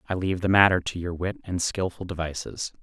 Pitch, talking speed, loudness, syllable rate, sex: 90 Hz, 210 wpm, -25 LUFS, 6.0 syllables/s, male